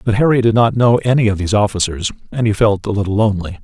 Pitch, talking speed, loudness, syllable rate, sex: 105 Hz, 250 wpm, -15 LUFS, 7.0 syllables/s, male